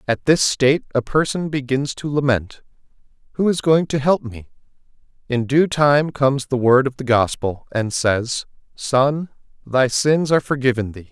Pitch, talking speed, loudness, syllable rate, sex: 135 Hz, 165 wpm, -19 LUFS, 4.6 syllables/s, male